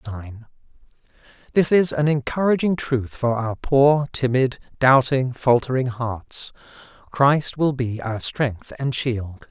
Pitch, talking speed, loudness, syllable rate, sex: 130 Hz, 125 wpm, -21 LUFS, 3.7 syllables/s, male